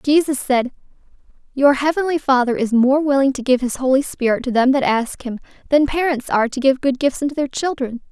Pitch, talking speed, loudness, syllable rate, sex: 265 Hz, 205 wpm, -18 LUFS, 5.7 syllables/s, female